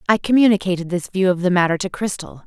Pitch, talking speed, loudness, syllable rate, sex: 190 Hz, 220 wpm, -18 LUFS, 6.6 syllables/s, female